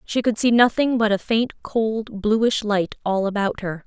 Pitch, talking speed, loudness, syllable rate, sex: 215 Hz, 200 wpm, -21 LUFS, 4.1 syllables/s, female